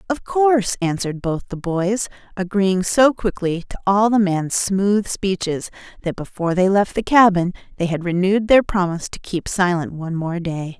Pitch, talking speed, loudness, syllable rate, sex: 190 Hz, 180 wpm, -19 LUFS, 5.0 syllables/s, female